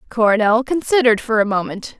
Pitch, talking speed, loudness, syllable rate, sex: 230 Hz, 150 wpm, -16 LUFS, 6.2 syllables/s, female